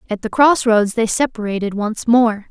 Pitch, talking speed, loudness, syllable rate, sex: 225 Hz, 190 wpm, -16 LUFS, 4.8 syllables/s, female